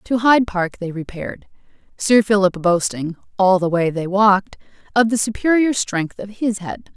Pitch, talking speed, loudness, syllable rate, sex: 200 Hz, 170 wpm, -18 LUFS, 4.8 syllables/s, female